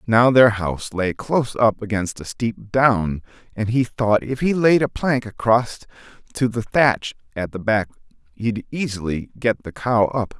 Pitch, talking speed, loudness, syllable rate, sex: 115 Hz, 180 wpm, -20 LUFS, 4.3 syllables/s, male